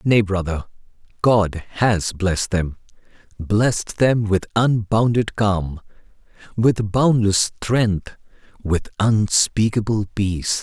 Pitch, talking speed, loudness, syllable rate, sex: 105 Hz, 95 wpm, -19 LUFS, 3.4 syllables/s, male